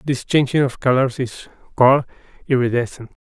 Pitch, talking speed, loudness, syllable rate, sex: 130 Hz, 130 wpm, -18 LUFS, 5.9 syllables/s, male